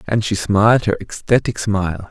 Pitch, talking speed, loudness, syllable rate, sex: 105 Hz, 170 wpm, -17 LUFS, 5.1 syllables/s, male